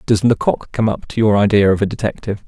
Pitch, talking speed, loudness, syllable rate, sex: 105 Hz, 240 wpm, -16 LUFS, 6.5 syllables/s, male